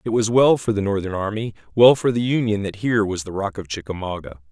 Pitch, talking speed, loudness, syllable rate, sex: 105 Hz, 240 wpm, -20 LUFS, 6.1 syllables/s, male